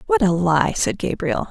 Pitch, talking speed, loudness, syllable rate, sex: 170 Hz, 200 wpm, -19 LUFS, 4.5 syllables/s, female